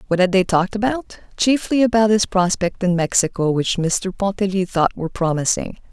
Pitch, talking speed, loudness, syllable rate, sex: 195 Hz, 170 wpm, -19 LUFS, 5.4 syllables/s, female